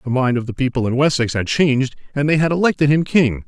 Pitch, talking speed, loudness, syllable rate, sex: 135 Hz, 260 wpm, -17 LUFS, 6.3 syllables/s, male